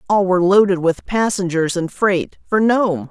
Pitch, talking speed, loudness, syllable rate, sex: 190 Hz, 175 wpm, -17 LUFS, 4.5 syllables/s, female